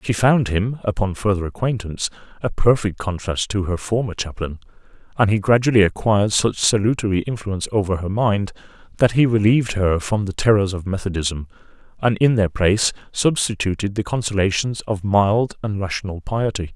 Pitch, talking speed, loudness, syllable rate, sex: 105 Hz, 160 wpm, -20 LUFS, 5.4 syllables/s, male